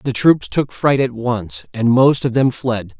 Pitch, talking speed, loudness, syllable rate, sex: 125 Hz, 220 wpm, -16 LUFS, 4.0 syllables/s, male